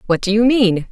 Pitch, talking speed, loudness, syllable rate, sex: 210 Hz, 260 wpm, -15 LUFS, 5.4 syllables/s, female